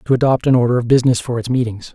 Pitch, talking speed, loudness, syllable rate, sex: 125 Hz, 275 wpm, -16 LUFS, 7.6 syllables/s, male